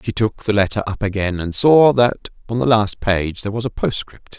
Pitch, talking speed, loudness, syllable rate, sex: 105 Hz, 235 wpm, -18 LUFS, 5.4 syllables/s, male